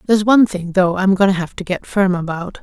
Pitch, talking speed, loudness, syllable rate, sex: 190 Hz, 275 wpm, -16 LUFS, 6.1 syllables/s, female